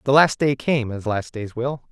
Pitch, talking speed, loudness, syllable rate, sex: 125 Hz, 250 wpm, -21 LUFS, 4.6 syllables/s, male